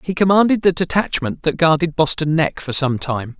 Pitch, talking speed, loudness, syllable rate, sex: 155 Hz, 195 wpm, -17 LUFS, 5.2 syllables/s, male